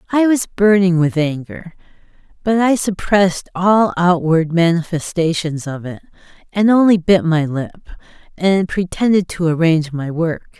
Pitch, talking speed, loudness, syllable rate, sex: 175 Hz, 135 wpm, -16 LUFS, 4.5 syllables/s, female